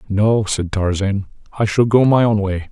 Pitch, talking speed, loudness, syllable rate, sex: 105 Hz, 200 wpm, -17 LUFS, 4.7 syllables/s, male